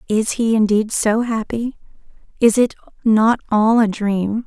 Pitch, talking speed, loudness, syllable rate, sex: 220 Hz, 150 wpm, -17 LUFS, 4.0 syllables/s, female